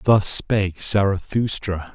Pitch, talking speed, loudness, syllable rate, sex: 100 Hz, 90 wpm, -20 LUFS, 3.9 syllables/s, male